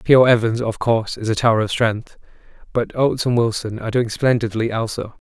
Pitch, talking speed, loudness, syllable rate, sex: 115 Hz, 205 wpm, -19 LUFS, 6.0 syllables/s, male